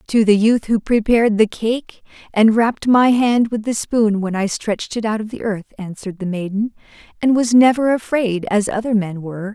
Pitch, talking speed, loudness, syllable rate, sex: 220 Hz, 205 wpm, -17 LUFS, 5.2 syllables/s, female